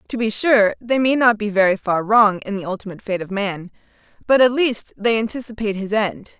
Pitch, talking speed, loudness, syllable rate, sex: 215 Hz, 215 wpm, -19 LUFS, 5.6 syllables/s, female